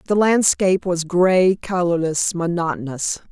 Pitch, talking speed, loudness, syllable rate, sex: 180 Hz, 110 wpm, -19 LUFS, 4.3 syllables/s, female